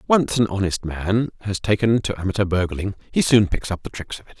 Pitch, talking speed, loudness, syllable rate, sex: 100 Hz, 230 wpm, -21 LUFS, 5.7 syllables/s, male